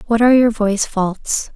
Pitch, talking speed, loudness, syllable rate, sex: 220 Hz, 195 wpm, -16 LUFS, 5.0 syllables/s, female